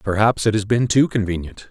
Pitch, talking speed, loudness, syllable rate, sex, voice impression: 110 Hz, 210 wpm, -19 LUFS, 5.6 syllables/s, male, very masculine, very middle-aged, very thick, tensed, very powerful, bright, soft, clear, very fluent, raspy, very cool, intellectual, slightly refreshing, sincere, calm, very mature, very friendly, reassuring, very unique, slightly elegant, wild, slightly sweet, lively, kind, intense